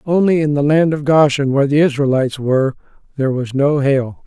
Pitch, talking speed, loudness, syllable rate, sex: 140 Hz, 195 wpm, -15 LUFS, 5.9 syllables/s, male